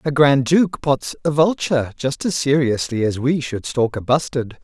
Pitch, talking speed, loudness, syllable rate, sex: 140 Hz, 195 wpm, -19 LUFS, 4.6 syllables/s, male